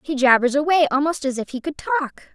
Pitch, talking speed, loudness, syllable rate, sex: 285 Hz, 230 wpm, -20 LUFS, 5.5 syllables/s, female